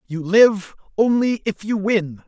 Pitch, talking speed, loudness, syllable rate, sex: 200 Hz, 160 wpm, -18 LUFS, 3.8 syllables/s, male